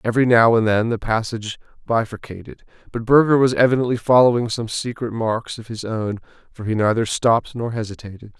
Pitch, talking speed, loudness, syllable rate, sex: 115 Hz, 170 wpm, -19 LUFS, 5.8 syllables/s, male